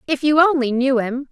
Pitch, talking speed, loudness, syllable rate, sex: 270 Hz, 225 wpm, -17 LUFS, 5.2 syllables/s, female